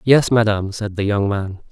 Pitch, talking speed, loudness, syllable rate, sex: 105 Hz, 210 wpm, -18 LUFS, 5.2 syllables/s, male